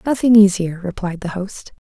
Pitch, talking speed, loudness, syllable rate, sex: 195 Hz, 155 wpm, -17 LUFS, 4.9 syllables/s, female